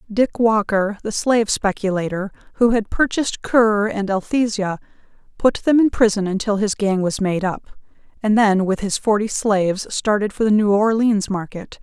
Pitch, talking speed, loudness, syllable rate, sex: 210 Hz, 165 wpm, -19 LUFS, 4.9 syllables/s, female